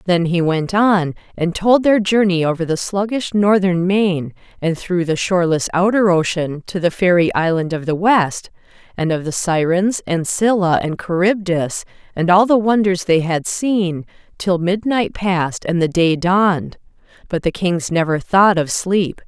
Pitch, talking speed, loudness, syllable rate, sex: 180 Hz, 170 wpm, -17 LUFS, 4.4 syllables/s, female